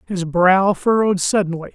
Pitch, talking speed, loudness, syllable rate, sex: 190 Hz, 140 wpm, -17 LUFS, 4.9 syllables/s, male